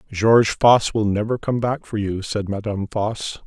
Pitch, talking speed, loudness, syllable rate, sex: 110 Hz, 190 wpm, -20 LUFS, 4.8 syllables/s, male